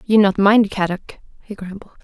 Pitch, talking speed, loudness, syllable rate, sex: 200 Hz, 175 wpm, -16 LUFS, 5.6 syllables/s, female